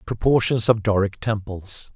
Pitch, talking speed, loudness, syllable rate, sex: 105 Hz, 125 wpm, -21 LUFS, 4.4 syllables/s, male